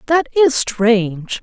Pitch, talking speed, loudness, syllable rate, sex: 245 Hz, 125 wpm, -15 LUFS, 3.4 syllables/s, female